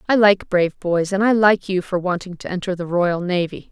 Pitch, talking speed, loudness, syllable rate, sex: 185 Hz, 240 wpm, -19 LUFS, 5.4 syllables/s, female